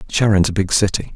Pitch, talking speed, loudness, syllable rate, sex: 100 Hz, 210 wpm, -16 LUFS, 6.1 syllables/s, male